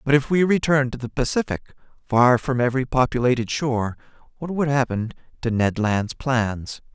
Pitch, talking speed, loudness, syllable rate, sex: 125 Hz, 165 wpm, -22 LUFS, 5.2 syllables/s, male